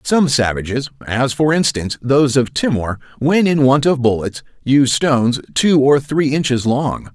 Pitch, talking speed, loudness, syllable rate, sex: 135 Hz, 150 wpm, -16 LUFS, 4.8 syllables/s, male